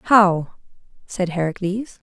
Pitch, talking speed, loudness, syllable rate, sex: 190 Hz, 85 wpm, -20 LUFS, 3.5 syllables/s, female